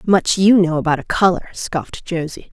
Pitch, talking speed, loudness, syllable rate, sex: 175 Hz, 185 wpm, -17 LUFS, 5.1 syllables/s, female